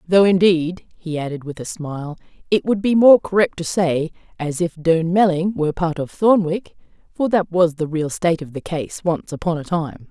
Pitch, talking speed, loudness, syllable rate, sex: 170 Hz, 200 wpm, -19 LUFS, 5.1 syllables/s, female